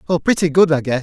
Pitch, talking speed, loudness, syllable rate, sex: 160 Hz, 295 wpm, -15 LUFS, 6.7 syllables/s, male